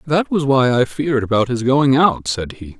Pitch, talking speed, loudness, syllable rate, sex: 130 Hz, 235 wpm, -16 LUFS, 4.9 syllables/s, male